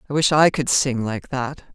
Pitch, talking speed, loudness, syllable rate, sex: 135 Hz, 240 wpm, -20 LUFS, 4.8 syllables/s, female